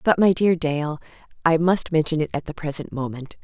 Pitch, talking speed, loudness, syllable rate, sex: 160 Hz, 210 wpm, -22 LUFS, 5.3 syllables/s, female